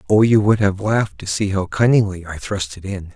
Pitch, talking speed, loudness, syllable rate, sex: 100 Hz, 245 wpm, -18 LUFS, 5.4 syllables/s, male